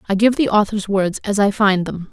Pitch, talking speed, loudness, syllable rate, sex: 205 Hz, 255 wpm, -17 LUFS, 5.3 syllables/s, female